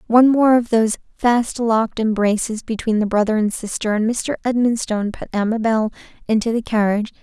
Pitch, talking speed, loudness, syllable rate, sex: 225 Hz, 165 wpm, -19 LUFS, 5.7 syllables/s, female